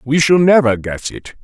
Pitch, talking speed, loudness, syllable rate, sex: 140 Hz, 210 wpm, -13 LUFS, 4.6 syllables/s, male